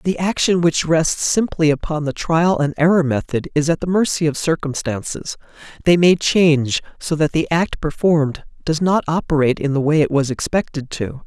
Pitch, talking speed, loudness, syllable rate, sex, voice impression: 155 Hz, 185 wpm, -18 LUFS, 5.1 syllables/s, male, masculine, very adult-like, slightly middle-aged, thick, slightly tensed, slightly weak, slightly dark, slightly soft, clear, slightly fluent, slightly cool, intellectual, slightly refreshing, sincere, very calm, slightly friendly, reassuring, unique, elegant, slightly sweet, kind, modest